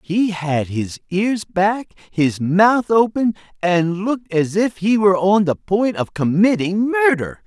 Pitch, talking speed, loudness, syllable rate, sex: 195 Hz, 160 wpm, -18 LUFS, 3.9 syllables/s, male